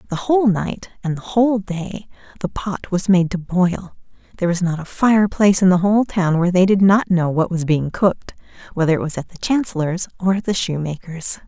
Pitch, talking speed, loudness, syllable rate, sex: 185 Hz, 220 wpm, -18 LUFS, 5.5 syllables/s, female